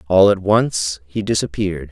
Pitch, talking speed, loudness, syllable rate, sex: 90 Hz, 155 wpm, -18 LUFS, 4.6 syllables/s, male